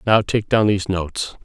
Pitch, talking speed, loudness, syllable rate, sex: 100 Hz, 210 wpm, -19 LUFS, 5.7 syllables/s, male